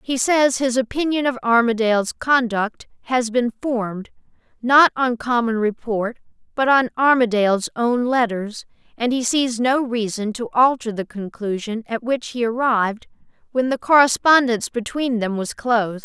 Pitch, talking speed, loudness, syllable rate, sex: 240 Hz, 145 wpm, -19 LUFS, 4.6 syllables/s, female